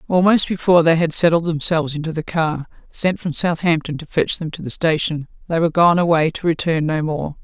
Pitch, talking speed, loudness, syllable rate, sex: 160 Hz, 210 wpm, -18 LUFS, 5.7 syllables/s, female